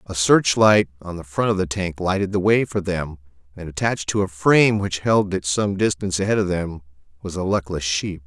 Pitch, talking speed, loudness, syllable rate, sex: 95 Hz, 225 wpm, -20 LUFS, 5.4 syllables/s, male